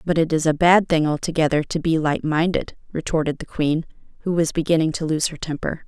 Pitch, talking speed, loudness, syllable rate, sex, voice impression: 160 Hz, 215 wpm, -21 LUFS, 5.7 syllables/s, female, very feminine, very adult-like, slightly middle-aged, thin, slightly tensed, slightly weak, slightly bright, slightly hard, slightly clear, fluent, slightly raspy, very cute, intellectual, very refreshing, sincere, calm, very friendly, very reassuring, very unique, very elegant, slightly wild, very sweet, slightly lively, very kind, slightly intense, modest, light